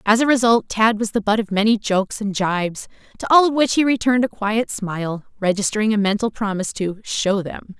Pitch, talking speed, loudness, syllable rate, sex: 215 Hz, 215 wpm, -19 LUFS, 5.8 syllables/s, female